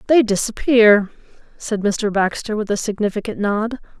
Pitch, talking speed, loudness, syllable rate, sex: 210 Hz, 135 wpm, -18 LUFS, 4.7 syllables/s, female